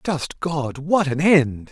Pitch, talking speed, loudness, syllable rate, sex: 150 Hz, 175 wpm, -20 LUFS, 3.1 syllables/s, male